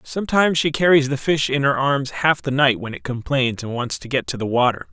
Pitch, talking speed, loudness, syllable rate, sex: 135 Hz, 255 wpm, -19 LUFS, 5.6 syllables/s, male